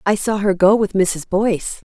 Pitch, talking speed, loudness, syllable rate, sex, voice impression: 200 Hz, 220 wpm, -17 LUFS, 4.9 syllables/s, female, feminine, middle-aged, tensed, soft, clear, fluent, intellectual, calm, reassuring, elegant, slightly kind